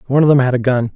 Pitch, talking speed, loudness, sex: 130 Hz, 380 wpm, -14 LUFS, male